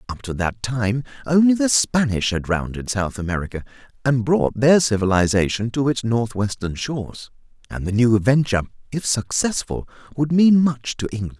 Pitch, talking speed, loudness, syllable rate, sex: 120 Hz, 160 wpm, -20 LUFS, 5.0 syllables/s, male